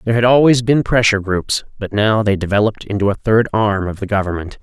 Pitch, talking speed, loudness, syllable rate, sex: 105 Hz, 220 wpm, -16 LUFS, 6.2 syllables/s, male